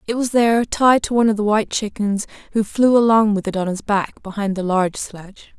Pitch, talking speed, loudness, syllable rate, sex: 210 Hz, 235 wpm, -18 LUFS, 5.8 syllables/s, female